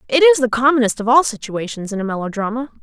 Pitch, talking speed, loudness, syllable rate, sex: 240 Hz, 210 wpm, -17 LUFS, 6.7 syllables/s, female